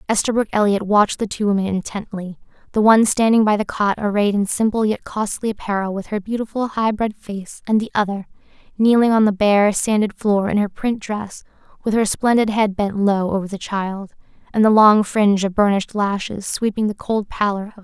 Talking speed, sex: 205 wpm, female